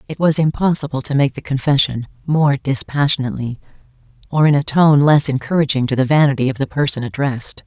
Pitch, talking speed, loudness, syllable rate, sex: 140 Hz, 170 wpm, -16 LUFS, 6.1 syllables/s, female